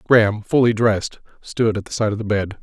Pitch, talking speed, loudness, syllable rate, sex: 110 Hz, 230 wpm, -19 LUFS, 5.7 syllables/s, male